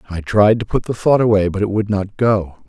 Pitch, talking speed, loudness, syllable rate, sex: 105 Hz, 270 wpm, -16 LUFS, 5.4 syllables/s, male